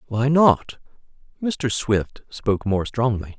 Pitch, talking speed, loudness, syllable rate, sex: 120 Hz, 125 wpm, -21 LUFS, 3.6 syllables/s, male